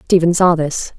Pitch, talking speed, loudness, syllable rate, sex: 165 Hz, 185 wpm, -15 LUFS, 4.6 syllables/s, female